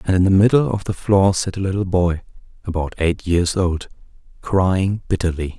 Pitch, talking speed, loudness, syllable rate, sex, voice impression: 95 Hz, 185 wpm, -19 LUFS, 4.9 syllables/s, male, very masculine, adult-like, slightly middle-aged, thick, slightly relaxed, powerful, slightly bright, very soft, muffled, fluent, slightly raspy, very cool, intellectual, slightly refreshing, sincere, very calm, mature, very friendly, very reassuring, very unique, very elegant, wild, very sweet, lively, very kind, slightly modest